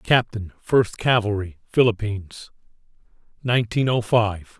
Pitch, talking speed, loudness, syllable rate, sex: 110 Hz, 90 wpm, -21 LUFS, 4.3 syllables/s, male